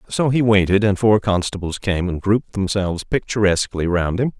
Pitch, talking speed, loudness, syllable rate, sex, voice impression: 100 Hz, 180 wpm, -19 LUFS, 5.5 syllables/s, male, very masculine, adult-like, slightly thick, cool, sincere, calm